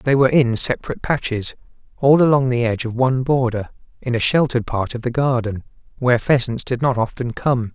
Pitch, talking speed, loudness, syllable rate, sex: 125 Hz, 195 wpm, -19 LUFS, 6.0 syllables/s, male